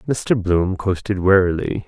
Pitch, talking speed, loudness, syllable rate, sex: 95 Hz, 130 wpm, -18 LUFS, 4.1 syllables/s, male